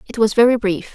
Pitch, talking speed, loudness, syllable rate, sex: 220 Hz, 255 wpm, -16 LUFS, 6.3 syllables/s, female